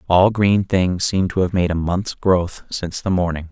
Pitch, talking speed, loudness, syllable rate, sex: 90 Hz, 220 wpm, -19 LUFS, 4.9 syllables/s, male